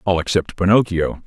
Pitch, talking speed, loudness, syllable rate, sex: 95 Hz, 145 wpm, -18 LUFS, 5.3 syllables/s, male